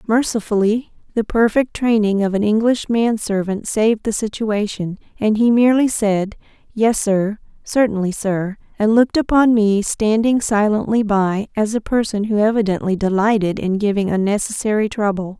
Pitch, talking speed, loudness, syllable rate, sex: 215 Hz, 140 wpm, -18 LUFS, 4.8 syllables/s, female